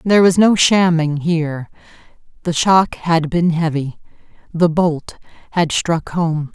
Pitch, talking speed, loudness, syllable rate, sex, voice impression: 165 Hz, 120 wpm, -16 LUFS, 4.0 syllables/s, female, very feminine, slightly middle-aged, slightly thin, very tensed, powerful, very bright, hard, clear, slightly halting, slightly raspy, cool, slightly intellectual, slightly refreshing, sincere, calm, slightly friendly, slightly reassuring, very unique, slightly elegant, very wild, slightly sweet, very lively, very strict, intense, sharp